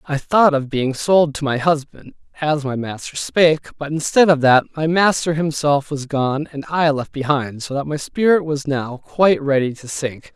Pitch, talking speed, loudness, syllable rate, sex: 145 Hz, 205 wpm, -18 LUFS, 4.6 syllables/s, male